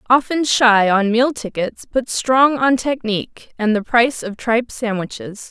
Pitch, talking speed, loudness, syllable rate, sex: 235 Hz, 165 wpm, -17 LUFS, 4.4 syllables/s, female